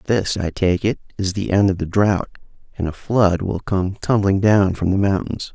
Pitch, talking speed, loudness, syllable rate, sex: 95 Hz, 215 wpm, -19 LUFS, 4.7 syllables/s, male